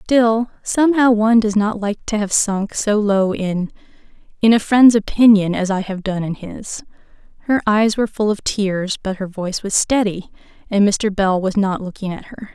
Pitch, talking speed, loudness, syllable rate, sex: 205 Hz, 190 wpm, -17 LUFS, 4.8 syllables/s, female